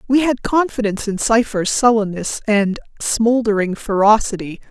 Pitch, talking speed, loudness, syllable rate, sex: 220 Hz, 115 wpm, -17 LUFS, 4.8 syllables/s, female